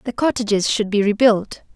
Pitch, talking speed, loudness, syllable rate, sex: 215 Hz, 170 wpm, -18 LUFS, 5.3 syllables/s, female